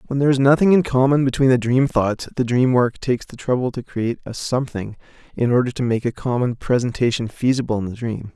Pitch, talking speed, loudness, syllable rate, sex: 125 Hz, 225 wpm, -19 LUFS, 6.2 syllables/s, male